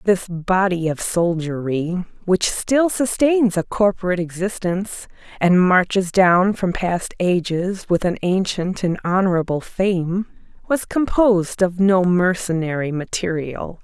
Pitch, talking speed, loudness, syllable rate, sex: 185 Hz, 115 wpm, -19 LUFS, 4.0 syllables/s, female